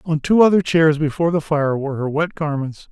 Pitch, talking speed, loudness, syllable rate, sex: 155 Hz, 225 wpm, -18 LUFS, 5.7 syllables/s, male